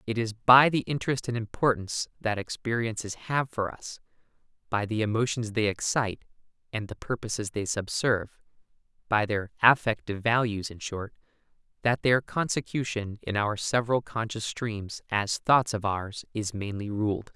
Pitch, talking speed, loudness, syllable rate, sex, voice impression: 110 Hz, 150 wpm, -27 LUFS, 4.9 syllables/s, male, masculine, adult-like, slightly refreshing, sincere, slightly unique, slightly kind